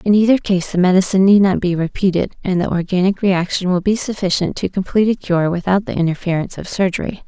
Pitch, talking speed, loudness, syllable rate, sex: 190 Hz, 205 wpm, -17 LUFS, 6.3 syllables/s, female